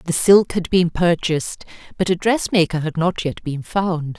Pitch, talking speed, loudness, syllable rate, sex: 170 Hz, 200 wpm, -19 LUFS, 4.4 syllables/s, female